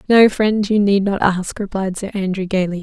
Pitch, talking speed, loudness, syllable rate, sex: 195 Hz, 215 wpm, -17 LUFS, 4.9 syllables/s, female